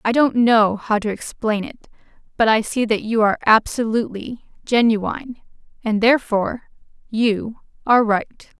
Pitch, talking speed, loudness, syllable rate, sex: 225 Hz, 140 wpm, -19 LUFS, 4.8 syllables/s, female